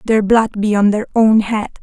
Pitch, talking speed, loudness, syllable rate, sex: 215 Hz, 230 wpm, -14 LUFS, 4.5 syllables/s, female